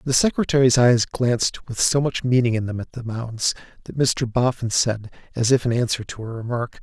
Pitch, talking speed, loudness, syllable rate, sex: 120 Hz, 210 wpm, -21 LUFS, 5.2 syllables/s, male